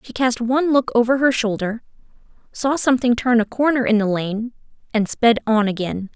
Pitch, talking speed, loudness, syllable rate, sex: 235 Hz, 185 wpm, -19 LUFS, 5.3 syllables/s, female